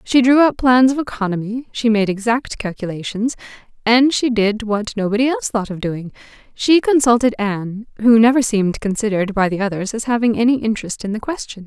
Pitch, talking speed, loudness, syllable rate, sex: 225 Hz, 185 wpm, -17 LUFS, 5.7 syllables/s, female